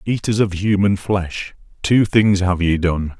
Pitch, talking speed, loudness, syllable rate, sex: 95 Hz, 170 wpm, -18 LUFS, 3.9 syllables/s, male